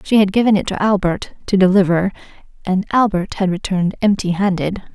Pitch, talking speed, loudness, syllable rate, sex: 190 Hz, 170 wpm, -17 LUFS, 5.7 syllables/s, female